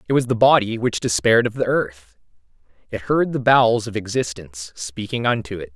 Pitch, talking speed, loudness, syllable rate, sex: 115 Hz, 175 wpm, -19 LUFS, 5.6 syllables/s, male